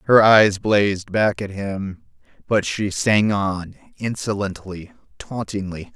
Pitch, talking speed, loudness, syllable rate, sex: 105 Hz, 120 wpm, -20 LUFS, 3.7 syllables/s, male